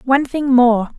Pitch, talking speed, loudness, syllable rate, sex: 255 Hz, 185 wpm, -14 LUFS, 5.1 syllables/s, female